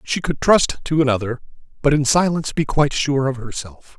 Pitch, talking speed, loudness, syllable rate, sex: 140 Hz, 195 wpm, -19 LUFS, 5.5 syllables/s, male